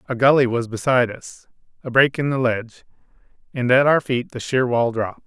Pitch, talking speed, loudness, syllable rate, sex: 125 Hz, 205 wpm, -19 LUFS, 6.0 syllables/s, male